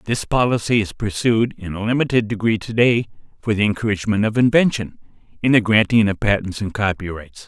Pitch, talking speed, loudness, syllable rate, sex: 110 Hz, 175 wpm, -19 LUFS, 5.8 syllables/s, male